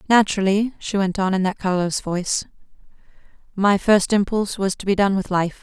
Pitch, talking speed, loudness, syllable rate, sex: 195 Hz, 180 wpm, -20 LUFS, 5.8 syllables/s, female